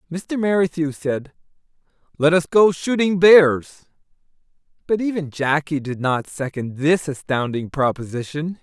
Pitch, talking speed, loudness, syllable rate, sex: 155 Hz, 120 wpm, -19 LUFS, 4.3 syllables/s, male